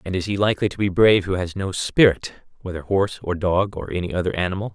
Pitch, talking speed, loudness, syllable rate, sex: 95 Hz, 240 wpm, -21 LUFS, 6.7 syllables/s, male